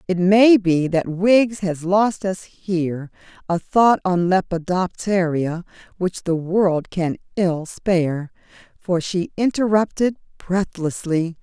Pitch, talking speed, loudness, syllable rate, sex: 185 Hz, 120 wpm, -20 LUFS, 3.6 syllables/s, female